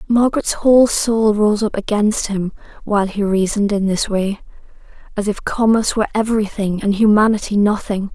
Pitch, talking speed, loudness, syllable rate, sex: 210 Hz, 145 wpm, -17 LUFS, 5.6 syllables/s, female